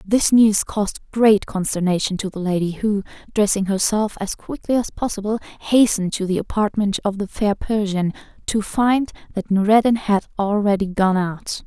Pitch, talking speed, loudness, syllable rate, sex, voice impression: 205 Hz, 160 wpm, -20 LUFS, 4.9 syllables/s, female, feminine, slightly young, slightly relaxed, slightly powerful, bright, soft, raspy, slightly cute, calm, friendly, reassuring, elegant, kind, modest